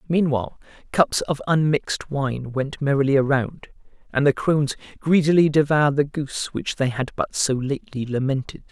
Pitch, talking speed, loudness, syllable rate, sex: 140 Hz, 150 wpm, -22 LUFS, 5.3 syllables/s, male